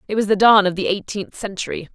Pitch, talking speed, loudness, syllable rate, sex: 200 Hz, 245 wpm, -18 LUFS, 6.3 syllables/s, female